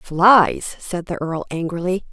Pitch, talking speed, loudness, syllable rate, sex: 175 Hz, 140 wpm, -19 LUFS, 3.7 syllables/s, female